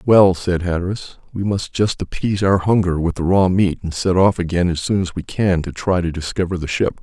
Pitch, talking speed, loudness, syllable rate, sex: 90 Hz, 240 wpm, -18 LUFS, 5.4 syllables/s, male